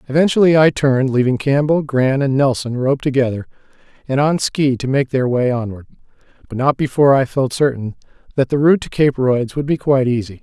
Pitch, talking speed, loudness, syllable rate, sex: 135 Hz, 195 wpm, -16 LUFS, 5.9 syllables/s, male